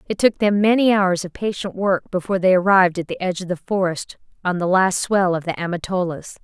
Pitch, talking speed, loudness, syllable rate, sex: 185 Hz, 225 wpm, -19 LUFS, 5.9 syllables/s, female